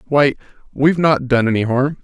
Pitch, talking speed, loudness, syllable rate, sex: 135 Hz, 175 wpm, -16 LUFS, 5.7 syllables/s, male